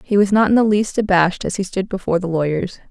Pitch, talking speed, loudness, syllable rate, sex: 190 Hz, 270 wpm, -17 LUFS, 6.6 syllables/s, female